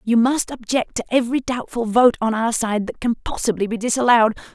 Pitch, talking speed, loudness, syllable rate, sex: 230 Hz, 200 wpm, -19 LUFS, 5.8 syllables/s, female